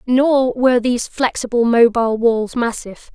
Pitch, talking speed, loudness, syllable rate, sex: 240 Hz, 135 wpm, -16 LUFS, 5.0 syllables/s, female